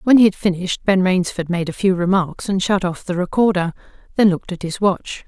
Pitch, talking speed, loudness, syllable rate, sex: 185 Hz, 225 wpm, -18 LUFS, 5.7 syllables/s, female